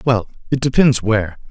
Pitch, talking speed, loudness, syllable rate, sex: 115 Hz, 160 wpm, -17 LUFS, 5.5 syllables/s, male